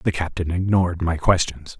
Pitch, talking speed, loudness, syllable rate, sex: 85 Hz, 165 wpm, -21 LUFS, 5.1 syllables/s, male